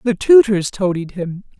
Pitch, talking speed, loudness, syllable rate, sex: 195 Hz, 150 wpm, -15 LUFS, 4.4 syllables/s, male